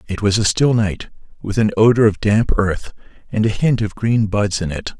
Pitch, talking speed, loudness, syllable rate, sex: 105 Hz, 230 wpm, -17 LUFS, 5.0 syllables/s, male